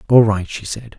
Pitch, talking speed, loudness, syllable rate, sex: 105 Hz, 245 wpm, -18 LUFS, 5.1 syllables/s, male